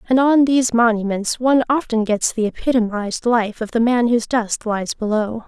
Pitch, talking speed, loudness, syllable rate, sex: 230 Hz, 185 wpm, -18 LUFS, 5.3 syllables/s, female